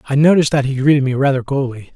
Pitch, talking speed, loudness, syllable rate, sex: 135 Hz, 245 wpm, -15 LUFS, 7.4 syllables/s, male